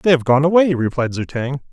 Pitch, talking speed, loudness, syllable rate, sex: 145 Hz, 245 wpm, -17 LUFS, 5.6 syllables/s, male